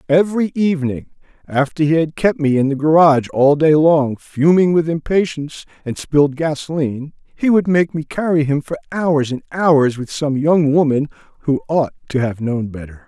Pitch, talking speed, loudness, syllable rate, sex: 150 Hz, 180 wpm, -16 LUFS, 5.1 syllables/s, male